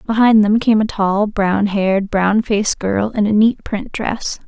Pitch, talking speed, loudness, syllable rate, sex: 205 Hz, 200 wpm, -16 LUFS, 4.2 syllables/s, female